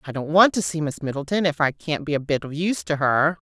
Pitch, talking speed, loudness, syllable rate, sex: 155 Hz, 295 wpm, -22 LUFS, 6.1 syllables/s, female